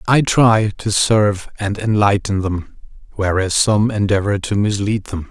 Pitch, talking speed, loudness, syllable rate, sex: 105 Hz, 145 wpm, -17 LUFS, 4.3 syllables/s, male